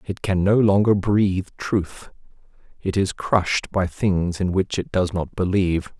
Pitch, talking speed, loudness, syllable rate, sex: 95 Hz, 170 wpm, -21 LUFS, 4.3 syllables/s, male